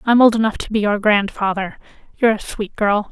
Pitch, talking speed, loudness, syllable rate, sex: 210 Hz, 210 wpm, -18 LUFS, 5.7 syllables/s, female